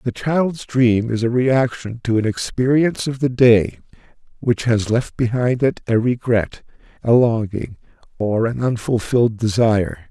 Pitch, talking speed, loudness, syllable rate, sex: 120 Hz, 150 wpm, -18 LUFS, 4.4 syllables/s, male